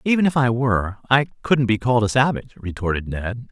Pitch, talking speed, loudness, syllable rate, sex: 120 Hz, 205 wpm, -20 LUFS, 6.2 syllables/s, male